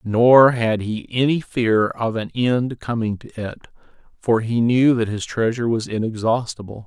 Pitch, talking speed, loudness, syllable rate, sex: 115 Hz, 165 wpm, -19 LUFS, 4.4 syllables/s, male